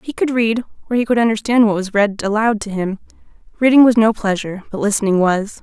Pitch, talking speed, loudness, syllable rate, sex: 215 Hz, 215 wpm, -16 LUFS, 6.2 syllables/s, female